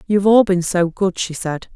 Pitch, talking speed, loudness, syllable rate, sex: 185 Hz, 240 wpm, -17 LUFS, 5.0 syllables/s, female